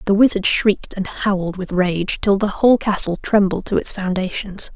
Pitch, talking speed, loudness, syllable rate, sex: 195 Hz, 190 wpm, -18 LUFS, 5.0 syllables/s, female